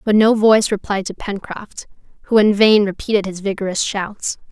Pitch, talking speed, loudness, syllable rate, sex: 205 Hz, 175 wpm, -17 LUFS, 5.1 syllables/s, female